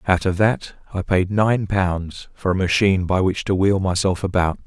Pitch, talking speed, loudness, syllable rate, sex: 95 Hz, 205 wpm, -20 LUFS, 4.6 syllables/s, male